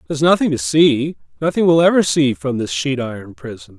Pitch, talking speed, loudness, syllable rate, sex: 150 Hz, 205 wpm, -16 LUFS, 5.7 syllables/s, male